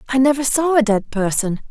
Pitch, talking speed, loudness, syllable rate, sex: 245 Hz, 210 wpm, -17 LUFS, 5.4 syllables/s, female